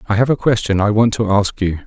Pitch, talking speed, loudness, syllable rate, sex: 105 Hz, 290 wpm, -16 LUFS, 5.9 syllables/s, male